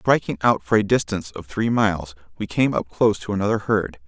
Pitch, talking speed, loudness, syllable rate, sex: 100 Hz, 220 wpm, -21 LUFS, 5.9 syllables/s, male